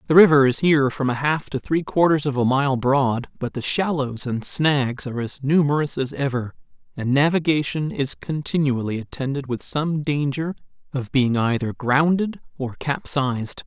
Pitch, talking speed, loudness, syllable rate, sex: 140 Hz, 165 wpm, -21 LUFS, 4.8 syllables/s, male